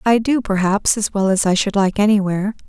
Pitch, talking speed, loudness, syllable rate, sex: 205 Hz, 225 wpm, -17 LUFS, 5.7 syllables/s, female